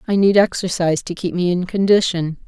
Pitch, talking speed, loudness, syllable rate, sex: 180 Hz, 195 wpm, -18 LUFS, 5.8 syllables/s, female